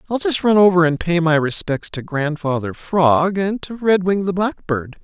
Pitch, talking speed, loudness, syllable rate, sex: 175 Hz, 190 wpm, -18 LUFS, 4.6 syllables/s, male